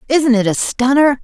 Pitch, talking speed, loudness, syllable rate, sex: 260 Hz, 195 wpm, -14 LUFS, 4.8 syllables/s, female